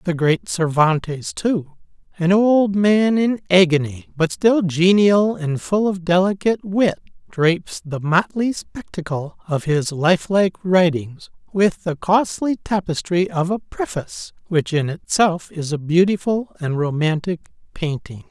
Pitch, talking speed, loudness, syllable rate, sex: 175 Hz, 135 wpm, -19 LUFS, 4.1 syllables/s, male